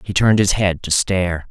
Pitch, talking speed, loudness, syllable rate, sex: 95 Hz, 240 wpm, -17 LUFS, 5.7 syllables/s, male